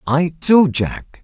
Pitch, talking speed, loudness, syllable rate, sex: 155 Hz, 145 wpm, -16 LUFS, 2.9 syllables/s, male